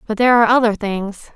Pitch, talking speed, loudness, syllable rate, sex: 220 Hz, 220 wpm, -15 LUFS, 6.7 syllables/s, female